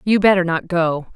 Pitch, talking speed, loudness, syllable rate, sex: 180 Hz, 205 wpm, -17 LUFS, 5.0 syllables/s, female